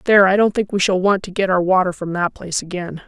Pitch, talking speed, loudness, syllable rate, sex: 185 Hz, 295 wpm, -18 LUFS, 6.5 syllables/s, female